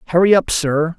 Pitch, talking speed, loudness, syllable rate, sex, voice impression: 170 Hz, 185 wpm, -15 LUFS, 5.6 syllables/s, male, very masculine, very adult-like, thick, relaxed, weak, slightly bright, soft, slightly muffled, fluent, cool, very intellectual, refreshing, very sincere, very calm, slightly mature, friendly, reassuring, slightly unique, elegant, sweet, lively, very kind, modest